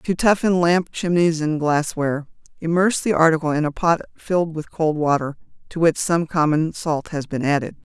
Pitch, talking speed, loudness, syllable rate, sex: 160 Hz, 175 wpm, -20 LUFS, 5.2 syllables/s, female